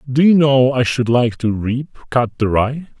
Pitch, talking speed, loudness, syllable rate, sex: 125 Hz, 240 wpm, -16 LUFS, 4.9 syllables/s, male